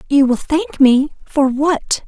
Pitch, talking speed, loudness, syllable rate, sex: 285 Hz, 145 wpm, -15 LUFS, 3.4 syllables/s, female